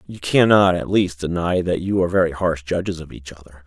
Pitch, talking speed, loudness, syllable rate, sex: 85 Hz, 230 wpm, -19 LUFS, 5.7 syllables/s, male